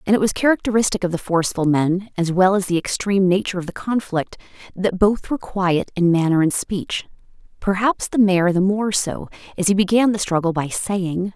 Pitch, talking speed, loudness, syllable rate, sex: 190 Hz, 195 wpm, -19 LUFS, 5.5 syllables/s, female